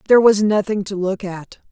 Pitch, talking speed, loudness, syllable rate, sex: 200 Hz, 210 wpm, -17 LUFS, 5.5 syllables/s, female